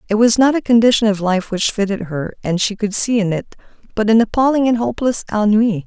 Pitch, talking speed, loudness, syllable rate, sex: 215 Hz, 225 wpm, -16 LUFS, 5.8 syllables/s, female